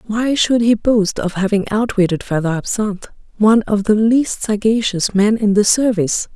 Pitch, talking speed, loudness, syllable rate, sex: 210 Hz, 170 wpm, -16 LUFS, 5.0 syllables/s, female